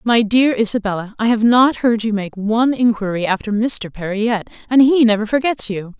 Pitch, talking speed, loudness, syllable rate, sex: 225 Hz, 200 wpm, -16 LUFS, 5.3 syllables/s, female